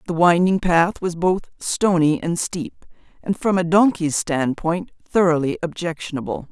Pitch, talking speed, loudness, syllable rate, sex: 170 Hz, 140 wpm, -20 LUFS, 4.5 syllables/s, female